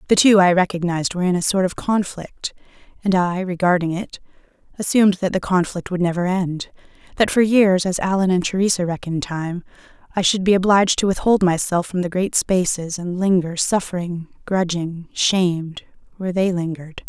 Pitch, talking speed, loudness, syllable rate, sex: 180 Hz, 170 wpm, -19 LUFS, 5.4 syllables/s, female